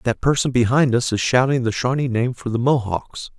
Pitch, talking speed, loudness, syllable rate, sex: 125 Hz, 215 wpm, -19 LUFS, 5.3 syllables/s, male